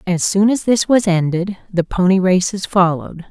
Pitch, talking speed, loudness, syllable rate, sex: 185 Hz, 180 wpm, -16 LUFS, 4.9 syllables/s, female